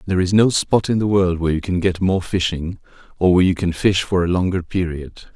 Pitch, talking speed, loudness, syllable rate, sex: 90 Hz, 245 wpm, -18 LUFS, 5.8 syllables/s, male